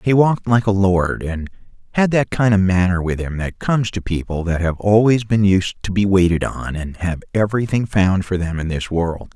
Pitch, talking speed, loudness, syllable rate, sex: 95 Hz, 225 wpm, -18 LUFS, 5.1 syllables/s, male